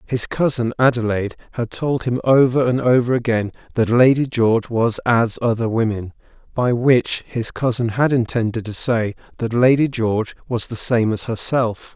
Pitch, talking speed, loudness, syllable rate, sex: 120 Hz, 160 wpm, -19 LUFS, 4.8 syllables/s, male